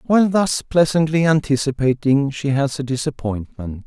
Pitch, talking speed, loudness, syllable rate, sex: 140 Hz, 125 wpm, -18 LUFS, 4.9 syllables/s, male